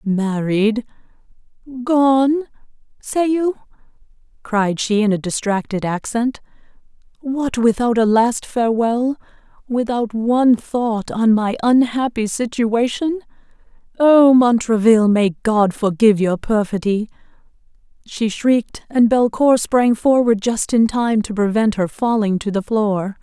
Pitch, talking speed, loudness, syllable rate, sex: 230 Hz, 110 wpm, -17 LUFS, 4.0 syllables/s, female